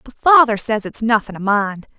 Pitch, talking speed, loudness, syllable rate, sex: 225 Hz, 210 wpm, -16 LUFS, 5.1 syllables/s, female